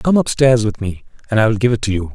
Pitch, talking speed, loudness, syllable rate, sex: 110 Hz, 335 wpm, -16 LUFS, 6.5 syllables/s, male